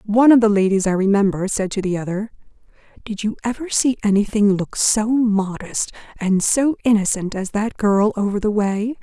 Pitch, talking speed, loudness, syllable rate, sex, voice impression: 210 Hz, 175 wpm, -18 LUFS, 5.1 syllables/s, female, feminine, adult-like, slightly weak, slightly raspy, calm, reassuring